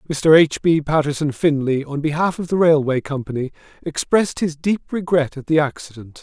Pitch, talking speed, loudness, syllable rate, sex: 150 Hz, 175 wpm, -19 LUFS, 5.3 syllables/s, male